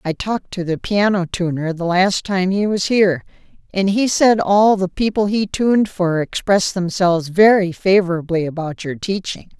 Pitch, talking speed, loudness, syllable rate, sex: 190 Hz, 175 wpm, -17 LUFS, 4.9 syllables/s, female